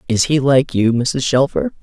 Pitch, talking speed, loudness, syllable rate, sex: 130 Hz, 195 wpm, -15 LUFS, 4.4 syllables/s, female